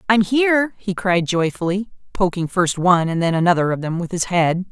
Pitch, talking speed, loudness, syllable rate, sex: 185 Hz, 205 wpm, -19 LUFS, 5.4 syllables/s, female